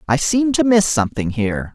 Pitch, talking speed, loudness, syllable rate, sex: 155 Hz, 205 wpm, -17 LUFS, 5.7 syllables/s, male